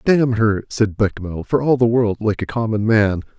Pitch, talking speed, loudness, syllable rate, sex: 110 Hz, 215 wpm, -18 LUFS, 4.9 syllables/s, male